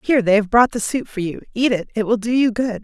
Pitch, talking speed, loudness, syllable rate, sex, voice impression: 225 Hz, 320 wpm, -18 LUFS, 6.3 syllables/s, female, feminine, adult-like, slightly powerful, slightly clear, friendly, slightly reassuring